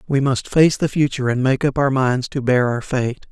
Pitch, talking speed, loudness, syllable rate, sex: 130 Hz, 255 wpm, -18 LUFS, 5.1 syllables/s, male